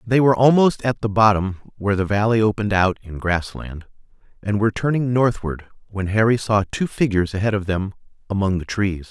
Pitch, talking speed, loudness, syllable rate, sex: 105 Hz, 190 wpm, -20 LUFS, 5.8 syllables/s, male